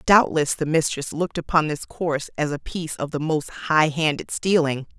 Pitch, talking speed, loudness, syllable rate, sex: 155 Hz, 180 wpm, -22 LUFS, 5.1 syllables/s, female